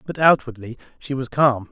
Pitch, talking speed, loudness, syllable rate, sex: 130 Hz, 175 wpm, -19 LUFS, 5.2 syllables/s, male